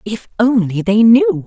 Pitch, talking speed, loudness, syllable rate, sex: 220 Hz, 165 wpm, -13 LUFS, 4.0 syllables/s, female